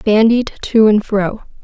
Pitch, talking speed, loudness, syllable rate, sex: 215 Hz, 145 wpm, -14 LUFS, 3.9 syllables/s, female